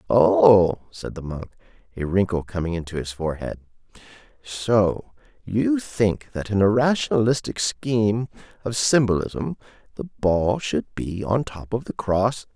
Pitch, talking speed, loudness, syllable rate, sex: 105 Hz, 140 wpm, -22 LUFS, 4.2 syllables/s, male